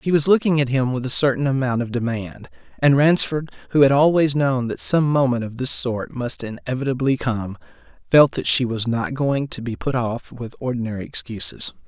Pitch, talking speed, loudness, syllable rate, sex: 130 Hz, 190 wpm, -20 LUFS, 5.2 syllables/s, male